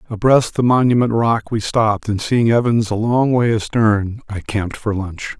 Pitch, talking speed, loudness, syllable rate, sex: 110 Hz, 190 wpm, -17 LUFS, 4.7 syllables/s, male